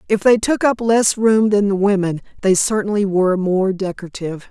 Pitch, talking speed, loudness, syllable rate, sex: 200 Hz, 185 wpm, -17 LUFS, 5.4 syllables/s, female